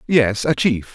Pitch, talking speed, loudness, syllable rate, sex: 125 Hz, 190 wpm, -18 LUFS, 3.9 syllables/s, male